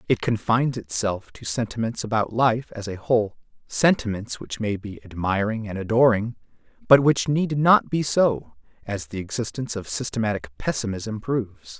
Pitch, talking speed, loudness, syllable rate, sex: 110 Hz, 155 wpm, -23 LUFS, 5.0 syllables/s, male